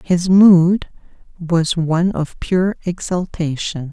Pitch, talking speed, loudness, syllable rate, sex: 175 Hz, 105 wpm, -16 LUFS, 3.4 syllables/s, female